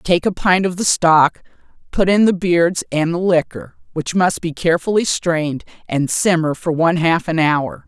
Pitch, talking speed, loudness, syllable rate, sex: 170 Hz, 190 wpm, -16 LUFS, 4.7 syllables/s, female